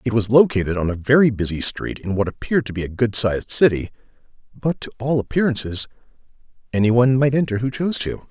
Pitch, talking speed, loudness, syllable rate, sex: 115 Hz, 200 wpm, -19 LUFS, 6.5 syllables/s, male